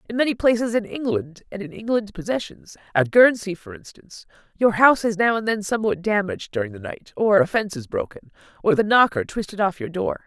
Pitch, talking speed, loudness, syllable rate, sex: 205 Hz, 200 wpm, -21 LUFS, 6.0 syllables/s, female